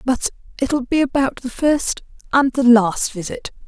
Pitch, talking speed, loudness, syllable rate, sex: 255 Hz, 165 wpm, -18 LUFS, 4.2 syllables/s, female